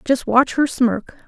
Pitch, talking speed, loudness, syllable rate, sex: 250 Hz, 190 wpm, -18 LUFS, 3.6 syllables/s, female